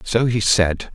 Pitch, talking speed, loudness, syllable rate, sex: 105 Hz, 190 wpm, -18 LUFS, 3.6 syllables/s, male